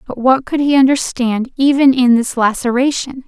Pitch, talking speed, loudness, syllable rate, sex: 255 Hz, 165 wpm, -14 LUFS, 4.8 syllables/s, female